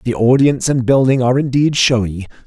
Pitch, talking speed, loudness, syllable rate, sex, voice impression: 125 Hz, 170 wpm, -14 LUFS, 6.0 syllables/s, male, very masculine, slightly young, slightly adult-like, thick, tensed, slightly powerful, slightly bright, slightly hard, clear, fluent, slightly raspy, cool, intellectual, refreshing, very sincere, slightly calm, mature, friendly, very reassuring, slightly unique, wild, sweet, lively, intense